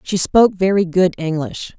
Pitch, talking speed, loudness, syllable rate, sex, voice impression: 180 Hz, 170 wpm, -16 LUFS, 4.9 syllables/s, female, feminine, adult-like, tensed, powerful, bright, clear, fluent, intellectual, calm, reassuring, elegant, slightly lively, slightly sharp